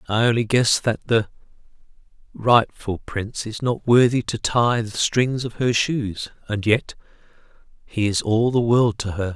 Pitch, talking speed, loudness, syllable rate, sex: 115 Hz, 155 wpm, -21 LUFS, 4.2 syllables/s, male